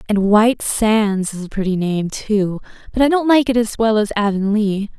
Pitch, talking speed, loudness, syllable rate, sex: 210 Hz, 205 wpm, -17 LUFS, 4.8 syllables/s, female